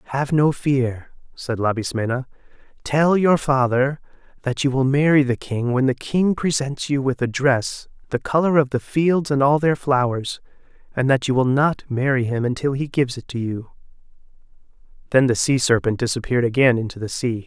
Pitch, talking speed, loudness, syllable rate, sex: 130 Hz, 180 wpm, -20 LUFS, 5.0 syllables/s, male